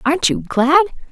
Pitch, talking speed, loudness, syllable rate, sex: 305 Hz, 160 wpm, -15 LUFS, 5.4 syllables/s, female